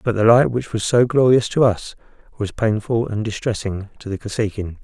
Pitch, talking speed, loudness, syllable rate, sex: 110 Hz, 200 wpm, -19 LUFS, 5.2 syllables/s, male